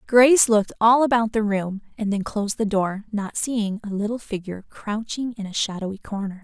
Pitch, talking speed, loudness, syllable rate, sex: 215 Hz, 195 wpm, -22 LUFS, 5.4 syllables/s, female